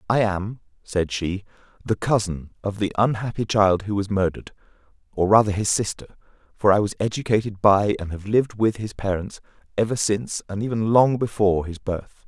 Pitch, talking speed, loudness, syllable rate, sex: 100 Hz, 175 wpm, -22 LUFS, 5.4 syllables/s, male